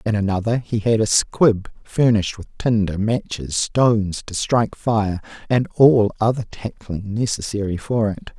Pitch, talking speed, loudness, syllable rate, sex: 110 Hz, 150 wpm, -20 LUFS, 4.5 syllables/s, male